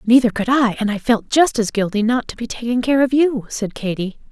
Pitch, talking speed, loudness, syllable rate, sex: 230 Hz, 250 wpm, -18 LUFS, 5.5 syllables/s, female